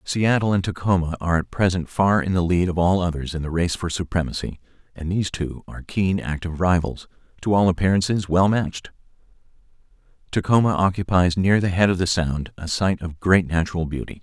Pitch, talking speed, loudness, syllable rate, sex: 90 Hz, 185 wpm, -21 LUFS, 5.8 syllables/s, male